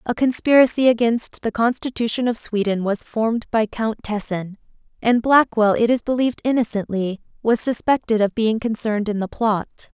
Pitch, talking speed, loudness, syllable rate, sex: 225 Hz, 155 wpm, -20 LUFS, 5.2 syllables/s, female